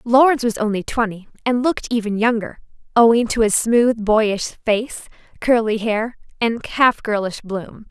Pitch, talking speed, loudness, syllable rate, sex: 225 Hz, 150 wpm, -18 LUFS, 4.5 syllables/s, female